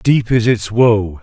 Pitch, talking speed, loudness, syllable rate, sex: 110 Hz, 195 wpm, -14 LUFS, 3.4 syllables/s, male